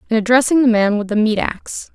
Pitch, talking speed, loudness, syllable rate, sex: 225 Hz, 245 wpm, -15 LUFS, 6.3 syllables/s, female